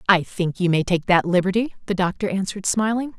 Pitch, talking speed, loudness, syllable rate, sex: 190 Hz, 205 wpm, -21 LUFS, 5.9 syllables/s, female